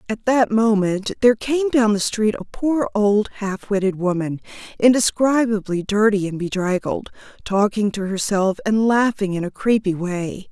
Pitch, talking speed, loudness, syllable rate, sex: 210 Hz, 155 wpm, -19 LUFS, 4.5 syllables/s, female